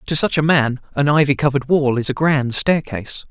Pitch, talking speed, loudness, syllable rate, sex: 140 Hz, 220 wpm, -17 LUFS, 5.5 syllables/s, male